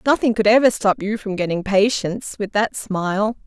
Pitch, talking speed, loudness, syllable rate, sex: 210 Hz, 175 wpm, -19 LUFS, 5.0 syllables/s, female